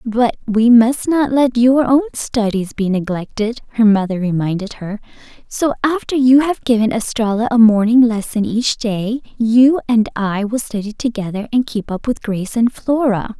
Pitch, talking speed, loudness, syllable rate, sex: 230 Hz, 170 wpm, -16 LUFS, 4.6 syllables/s, female